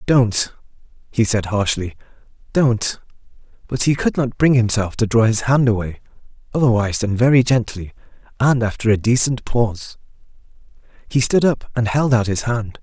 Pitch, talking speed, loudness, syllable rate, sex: 115 Hz, 155 wpm, -18 LUFS, 5.1 syllables/s, male